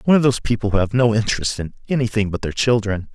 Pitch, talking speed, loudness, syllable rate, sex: 110 Hz, 250 wpm, -19 LUFS, 7.3 syllables/s, male